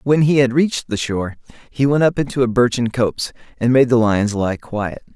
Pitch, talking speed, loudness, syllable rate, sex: 125 Hz, 220 wpm, -17 LUFS, 5.4 syllables/s, male